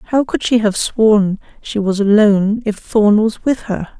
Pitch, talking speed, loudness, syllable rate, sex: 215 Hz, 195 wpm, -15 LUFS, 4.1 syllables/s, female